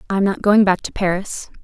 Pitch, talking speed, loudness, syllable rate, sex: 195 Hz, 255 wpm, -17 LUFS, 6.0 syllables/s, female